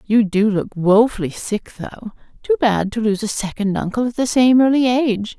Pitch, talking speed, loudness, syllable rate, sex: 225 Hz, 200 wpm, -17 LUFS, 4.9 syllables/s, female